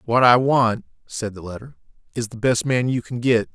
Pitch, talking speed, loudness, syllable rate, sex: 120 Hz, 220 wpm, -20 LUFS, 5.0 syllables/s, male